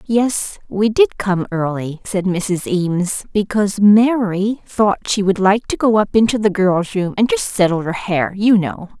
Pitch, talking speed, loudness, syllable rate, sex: 200 Hz, 185 wpm, -16 LUFS, 4.2 syllables/s, female